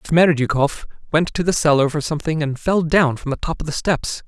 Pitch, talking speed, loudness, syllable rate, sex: 155 Hz, 225 wpm, -19 LUFS, 5.4 syllables/s, male